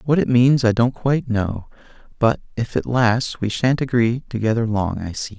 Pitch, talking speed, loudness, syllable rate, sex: 115 Hz, 200 wpm, -19 LUFS, 4.8 syllables/s, male